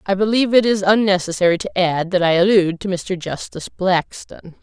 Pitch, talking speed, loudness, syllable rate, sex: 185 Hz, 180 wpm, -17 LUFS, 6.1 syllables/s, female